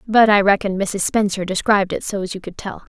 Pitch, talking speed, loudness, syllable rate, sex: 200 Hz, 225 wpm, -18 LUFS, 5.5 syllables/s, female